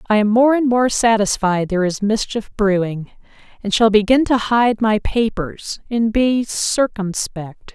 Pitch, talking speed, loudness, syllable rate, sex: 220 Hz, 155 wpm, -17 LUFS, 4.2 syllables/s, female